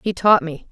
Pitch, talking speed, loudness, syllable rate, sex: 180 Hz, 250 wpm, -17 LUFS, 4.6 syllables/s, female